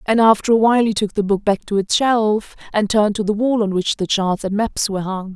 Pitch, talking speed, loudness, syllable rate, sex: 210 Hz, 280 wpm, -18 LUFS, 5.7 syllables/s, female